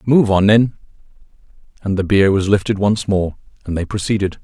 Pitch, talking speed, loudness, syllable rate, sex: 100 Hz, 175 wpm, -16 LUFS, 5.4 syllables/s, male